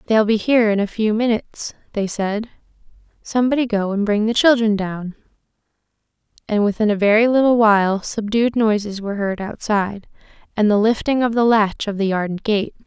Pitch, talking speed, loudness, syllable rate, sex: 215 Hz, 175 wpm, -18 LUFS, 5.5 syllables/s, female